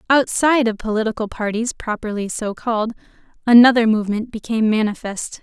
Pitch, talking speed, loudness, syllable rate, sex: 225 Hz, 120 wpm, -18 LUFS, 6.0 syllables/s, female